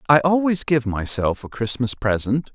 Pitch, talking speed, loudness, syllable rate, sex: 130 Hz, 165 wpm, -21 LUFS, 4.6 syllables/s, male